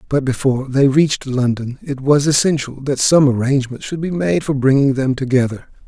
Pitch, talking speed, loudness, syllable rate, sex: 135 Hz, 185 wpm, -16 LUFS, 5.4 syllables/s, male